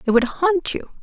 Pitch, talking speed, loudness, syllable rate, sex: 305 Hz, 235 wpm, -20 LUFS, 4.7 syllables/s, female